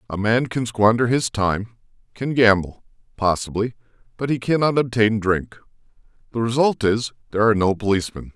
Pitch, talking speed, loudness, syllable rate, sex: 110 Hz, 150 wpm, -20 LUFS, 5.5 syllables/s, male